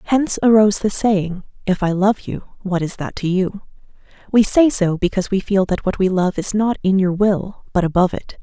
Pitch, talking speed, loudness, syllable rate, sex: 195 Hz, 220 wpm, -18 LUFS, 5.4 syllables/s, female